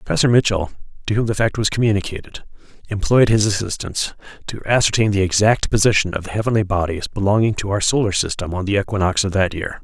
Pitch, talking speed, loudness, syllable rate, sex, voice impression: 100 Hz, 190 wpm, -18 LUFS, 6.4 syllables/s, male, masculine, adult-like, slightly thick, slightly tensed, hard, clear, fluent, cool, intellectual, slightly mature, slightly friendly, elegant, slightly wild, strict, slightly sharp